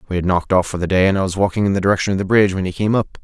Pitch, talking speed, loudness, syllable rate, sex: 95 Hz, 390 wpm, -17 LUFS, 8.5 syllables/s, male